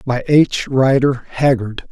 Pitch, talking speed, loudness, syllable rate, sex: 130 Hz, 125 wpm, -15 LUFS, 3.5 syllables/s, male